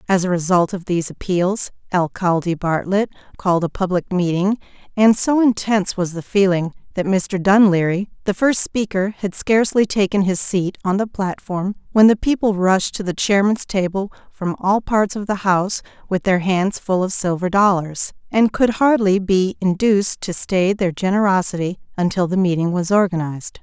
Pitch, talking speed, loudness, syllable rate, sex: 190 Hz, 170 wpm, -18 LUFS, 4.9 syllables/s, female